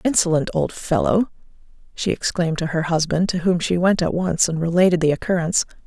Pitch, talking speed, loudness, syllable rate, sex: 170 Hz, 185 wpm, -20 LUFS, 5.9 syllables/s, female